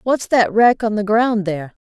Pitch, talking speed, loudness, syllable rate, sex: 215 Hz, 230 wpm, -16 LUFS, 4.8 syllables/s, female